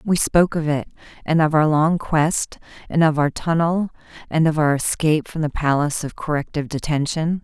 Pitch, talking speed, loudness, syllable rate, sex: 155 Hz, 185 wpm, -20 LUFS, 5.4 syllables/s, female